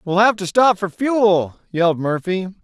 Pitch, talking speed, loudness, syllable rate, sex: 190 Hz, 180 wpm, -18 LUFS, 4.3 syllables/s, male